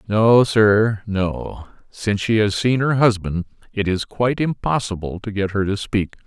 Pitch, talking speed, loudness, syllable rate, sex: 105 Hz, 170 wpm, -19 LUFS, 4.4 syllables/s, male